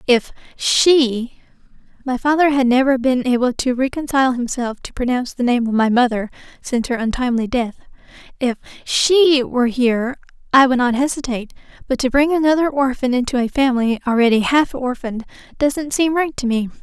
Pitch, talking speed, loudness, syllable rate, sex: 255 Hz, 160 wpm, -17 LUFS, 3.6 syllables/s, female